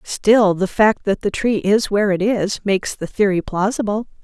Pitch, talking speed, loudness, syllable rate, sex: 205 Hz, 200 wpm, -18 LUFS, 4.8 syllables/s, female